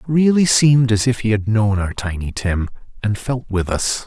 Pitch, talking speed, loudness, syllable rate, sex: 110 Hz, 220 wpm, -18 LUFS, 4.9 syllables/s, male